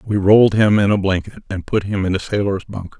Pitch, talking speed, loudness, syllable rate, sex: 100 Hz, 260 wpm, -16 LUFS, 5.8 syllables/s, male